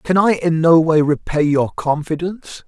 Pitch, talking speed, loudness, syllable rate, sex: 160 Hz, 180 wpm, -16 LUFS, 4.7 syllables/s, male